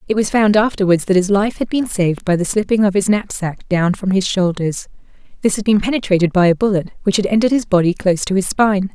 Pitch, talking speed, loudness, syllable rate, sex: 195 Hz, 240 wpm, -16 LUFS, 6.3 syllables/s, female